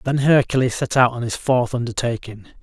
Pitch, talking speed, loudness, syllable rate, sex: 125 Hz, 185 wpm, -19 LUFS, 5.5 syllables/s, male